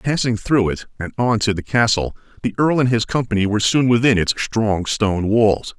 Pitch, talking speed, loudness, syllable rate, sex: 110 Hz, 210 wpm, -18 LUFS, 5.1 syllables/s, male